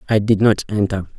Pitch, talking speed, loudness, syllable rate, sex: 105 Hz, 200 wpm, -17 LUFS, 5.3 syllables/s, male